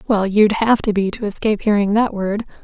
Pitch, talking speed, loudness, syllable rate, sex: 210 Hz, 230 wpm, -17 LUFS, 5.6 syllables/s, female